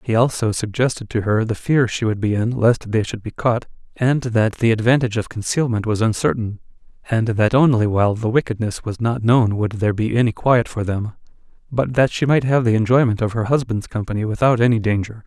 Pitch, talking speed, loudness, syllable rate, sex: 115 Hz, 210 wpm, -19 LUFS, 5.2 syllables/s, male